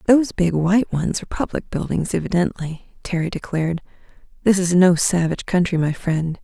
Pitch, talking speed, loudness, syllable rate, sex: 175 Hz, 160 wpm, -20 LUFS, 5.5 syllables/s, female